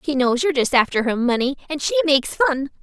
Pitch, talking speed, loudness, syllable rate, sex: 280 Hz, 235 wpm, -19 LUFS, 6.4 syllables/s, female